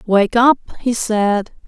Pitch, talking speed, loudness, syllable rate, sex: 225 Hz, 145 wpm, -16 LUFS, 3.3 syllables/s, female